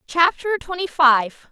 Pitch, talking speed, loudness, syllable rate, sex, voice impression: 315 Hz, 120 wpm, -18 LUFS, 3.7 syllables/s, female, feminine, adult-like, tensed, powerful, slightly bright, raspy, friendly, slightly unique, lively, intense